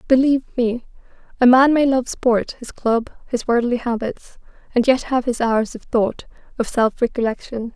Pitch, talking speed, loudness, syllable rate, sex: 240 Hz, 160 wpm, -19 LUFS, 4.7 syllables/s, female